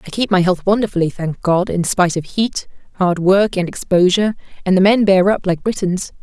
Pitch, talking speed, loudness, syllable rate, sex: 190 Hz, 210 wpm, -16 LUFS, 5.6 syllables/s, female